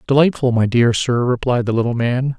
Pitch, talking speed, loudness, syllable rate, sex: 125 Hz, 200 wpm, -17 LUFS, 5.3 syllables/s, male